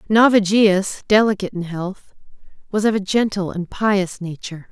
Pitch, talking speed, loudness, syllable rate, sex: 195 Hz, 140 wpm, -18 LUFS, 4.9 syllables/s, female